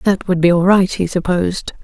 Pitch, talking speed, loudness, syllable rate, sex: 180 Hz, 230 wpm, -15 LUFS, 5.4 syllables/s, female